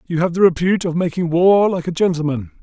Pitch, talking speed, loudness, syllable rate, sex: 170 Hz, 230 wpm, -17 LUFS, 6.3 syllables/s, male